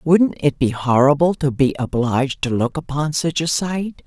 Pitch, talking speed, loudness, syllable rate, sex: 145 Hz, 190 wpm, -19 LUFS, 4.6 syllables/s, female